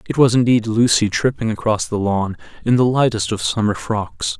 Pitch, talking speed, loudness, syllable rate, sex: 110 Hz, 190 wpm, -18 LUFS, 5.0 syllables/s, male